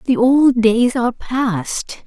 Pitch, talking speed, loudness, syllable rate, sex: 235 Hz, 145 wpm, -16 LUFS, 3.8 syllables/s, female